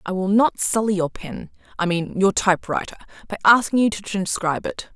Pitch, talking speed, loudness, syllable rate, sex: 200 Hz, 170 wpm, -20 LUFS, 5.6 syllables/s, female